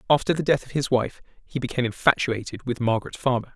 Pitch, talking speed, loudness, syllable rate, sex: 125 Hz, 200 wpm, -24 LUFS, 6.8 syllables/s, male